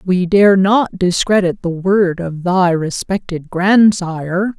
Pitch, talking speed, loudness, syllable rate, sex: 185 Hz, 130 wpm, -14 LUFS, 3.6 syllables/s, female